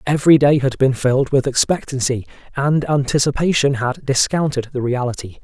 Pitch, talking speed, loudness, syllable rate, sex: 135 Hz, 145 wpm, -17 LUFS, 5.5 syllables/s, male